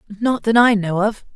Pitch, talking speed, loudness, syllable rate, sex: 215 Hz, 220 wpm, -17 LUFS, 6.0 syllables/s, female